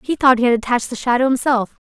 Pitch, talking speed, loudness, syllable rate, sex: 245 Hz, 255 wpm, -17 LUFS, 7.1 syllables/s, female